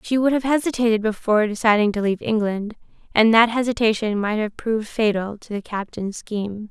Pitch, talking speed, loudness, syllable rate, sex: 220 Hz, 180 wpm, -21 LUFS, 5.8 syllables/s, female